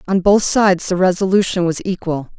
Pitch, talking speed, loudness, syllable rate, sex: 185 Hz, 175 wpm, -16 LUFS, 5.7 syllables/s, female